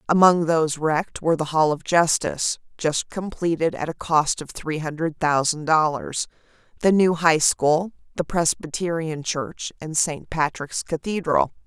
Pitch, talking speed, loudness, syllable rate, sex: 160 Hz, 150 wpm, -22 LUFS, 4.5 syllables/s, female